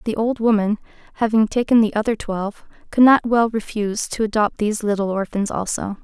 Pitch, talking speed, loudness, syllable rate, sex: 215 Hz, 180 wpm, -19 LUFS, 5.7 syllables/s, female